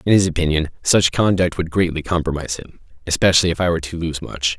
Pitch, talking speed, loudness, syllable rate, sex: 85 Hz, 195 wpm, -19 LUFS, 6.6 syllables/s, male